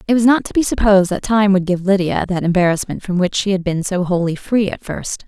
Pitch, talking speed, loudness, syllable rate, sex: 190 Hz, 260 wpm, -17 LUFS, 5.9 syllables/s, female